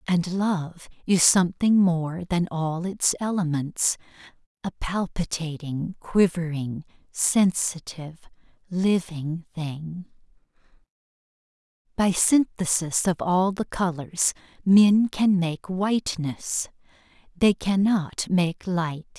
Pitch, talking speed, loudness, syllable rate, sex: 175 Hz, 90 wpm, -24 LUFS, 3.4 syllables/s, female